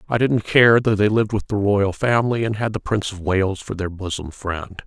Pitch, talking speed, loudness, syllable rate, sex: 105 Hz, 245 wpm, -20 LUFS, 5.4 syllables/s, male